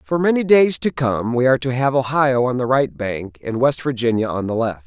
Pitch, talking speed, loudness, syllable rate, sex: 125 Hz, 245 wpm, -18 LUFS, 5.3 syllables/s, male